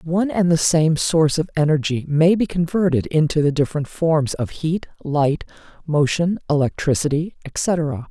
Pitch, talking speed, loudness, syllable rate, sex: 160 Hz, 150 wpm, -19 LUFS, 4.7 syllables/s, female